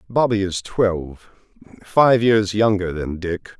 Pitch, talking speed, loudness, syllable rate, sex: 100 Hz, 115 wpm, -19 LUFS, 3.9 syllables/s, male